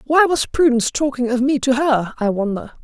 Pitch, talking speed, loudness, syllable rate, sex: 260 Hz, 210 wpm, -18 LUFS, 5.4 syllables/s, female